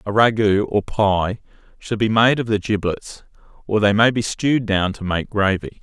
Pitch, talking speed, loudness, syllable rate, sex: 105 Hz, 195 wpm, -19 LUFS, 4.7 syllables/s, male